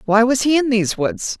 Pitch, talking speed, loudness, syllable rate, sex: 240 Hz, 255 wpm, -17 LUFS, 5.6 syllables/s, female